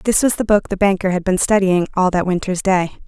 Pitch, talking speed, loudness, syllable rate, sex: 190 Hz, 255 wpm, -17 LUFS, 5.8 syllables/s, female